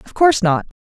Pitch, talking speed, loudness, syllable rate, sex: 225 Hz, 215 wpm, -16 LUFS, 7.1 syllables/s, female